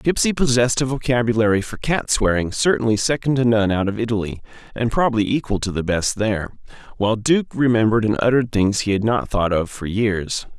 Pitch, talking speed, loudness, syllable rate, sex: 115 Hz, 195 wpm, -19 LUFS, 5.9 syllables/s, male